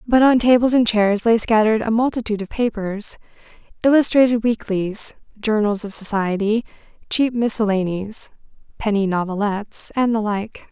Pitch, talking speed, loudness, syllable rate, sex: 220 Hz, 130 wpm, -19 LUFS, 5.1 syllables/s, female